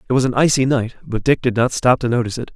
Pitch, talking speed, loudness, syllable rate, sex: 125 Hz, 305 wpm, -17 LUFS, 7.1 syllables/s, male